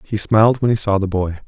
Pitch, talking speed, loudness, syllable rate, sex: 105 Hz, 285 wpm, -16 LUFS, 6.7 syllables/s, male